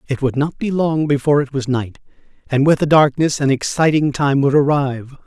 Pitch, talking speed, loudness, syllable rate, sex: 140 Hz, 205 wpm, -16 LUFS, 5.5 syllables/s, male